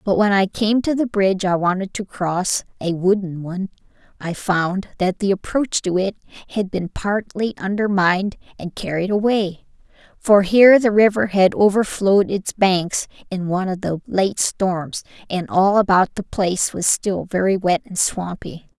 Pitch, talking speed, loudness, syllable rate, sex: 195 Hz, 165 wpm, -19 LUFS, 4.6 syllables/s, female